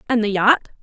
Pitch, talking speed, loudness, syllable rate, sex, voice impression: 225 Hz, 215 wpm, -17 LUFS, 5.6 syllables/s, female, very feminine, very adult-like, slightly middle-aged, very thin, very tensed, very powerful, very bright, very hard, very clear, very fluent, slightly nasal, cool, intellectual, very refreshing, slightly sincere, slightly calm, slightly friendly, slightly reassuring, very unique, slightly elegant, wild, slightly sweet, very lively, very strict, very intense, very sharp, light